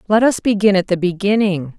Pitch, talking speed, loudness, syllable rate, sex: 200 Hz, 200 wpm, -16 LUFS, 5.6 syllables/s, female